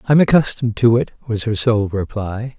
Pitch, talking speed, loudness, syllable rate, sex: 110 Hz, 185 wpm, -17 LUFS, 5.3 syllables/s, male